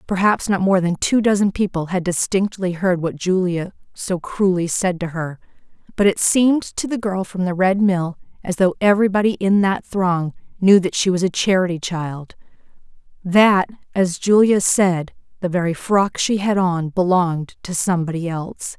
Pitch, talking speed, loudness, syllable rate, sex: 185 Hz, 170 wpm, -18 LUFS, 4.8 syllables/s, female